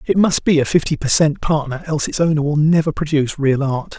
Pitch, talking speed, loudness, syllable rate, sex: 150 Hz, 240 wpm, -17 LUFS, 6.0 syllables/s, male